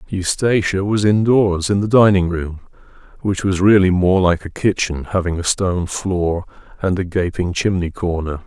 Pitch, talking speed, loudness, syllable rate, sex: 95 Hz, 165 wpm, -17 LUFS, 4.7 syllables/s, male